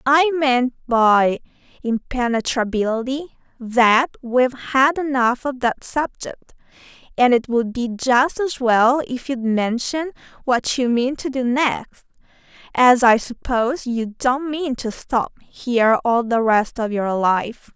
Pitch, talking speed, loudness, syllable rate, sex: 250 Hz, 140 wpm, -19 LUFS, 3.7 syllables/s, female